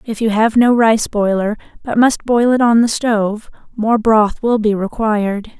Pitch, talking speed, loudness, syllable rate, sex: 220 Hz, 195 wpm, -15 LUFS, 4.4 syllables/s, female